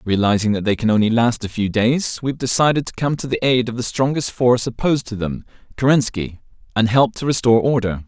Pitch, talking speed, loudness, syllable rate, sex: 120 Hz, 210 wpm, -18 LUFS, 6.1 syllables/s, male